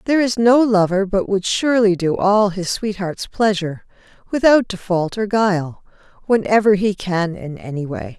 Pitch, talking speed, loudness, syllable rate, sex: 195 Hz, 170 wpm, -18 LUFS, 4.9 syllables/s, female